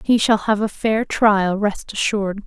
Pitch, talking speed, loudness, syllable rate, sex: 210 Hz, 195 wpm, -19 LUFS, 4.2 syllables/s, female